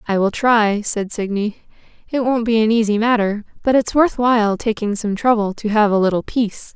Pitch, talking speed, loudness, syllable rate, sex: 220 Hz, 205 wpm, -18 LUFS, 5.2 syllables/s, female